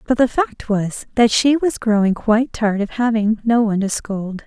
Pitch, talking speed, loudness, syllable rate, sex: 225 Hz, 215 wpm, -18 LUFS, 5.0 syllables/s, female